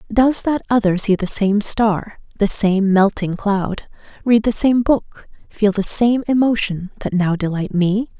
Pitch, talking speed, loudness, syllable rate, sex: 210 Hz, 170 wpm, -17 LUFS, 4.2 syllables/s, female